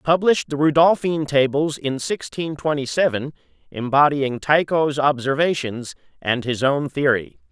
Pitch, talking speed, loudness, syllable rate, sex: 145 Hz, 120 wpm, -20 LUFS, 4.6 syllables/s, male